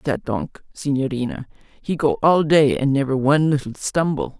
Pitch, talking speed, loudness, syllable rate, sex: 145 Hz, 165 wpm, -20 LUFS, 4.8 syllables/s, female